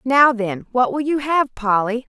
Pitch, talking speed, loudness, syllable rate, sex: 245 Hz, 195 wpm, -19 LUFS, 4.1 syllables/s, female